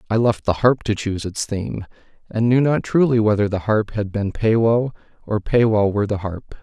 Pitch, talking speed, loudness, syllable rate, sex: 110 Hz, 210 wpm, -19 LUFS, 5.3 syllables/s, male